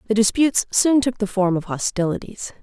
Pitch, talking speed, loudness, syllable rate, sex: 215 Hz, 185 wpm, -20 LUFS, 5.6 syllables/s, female